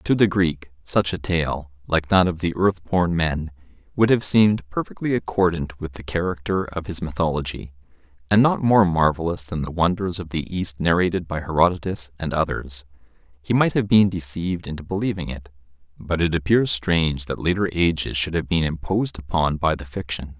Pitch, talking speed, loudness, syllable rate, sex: 85 Hz, 180 wpm, -22 LUFS, 5.2 syllables/s, male